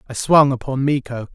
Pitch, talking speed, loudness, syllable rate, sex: 135 Hz, 180 wpm, -17 LUFS, 5.2 syllables/s, male